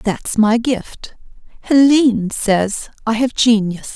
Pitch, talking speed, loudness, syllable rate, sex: 225 Hz, 120 wpm, -15 LUFS, 3.5 syllables/s, female